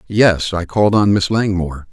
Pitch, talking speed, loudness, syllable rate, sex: 95 Hz, 190 wpm, -15 LUFS, 5.2 syllables/s, male